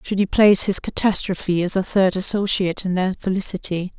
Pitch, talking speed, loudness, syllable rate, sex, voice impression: 190 Hz, 180 wpm, -19 LUFS, 5.7 syllables/s, female, feminine, adult-like, tensed, slightly powerful, slightly hard, fluent, intellectual, calm, elegant, lively, slightly strict, sharp